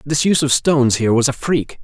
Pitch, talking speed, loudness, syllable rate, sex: 135 Hz, 260 wpm, -16 LUFS, 6.4 syllables/s, male